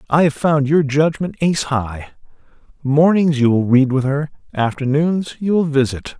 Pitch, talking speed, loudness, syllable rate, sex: 145 Hz, 165 wpm, -17 LUFS, 4.7 syllables/s, male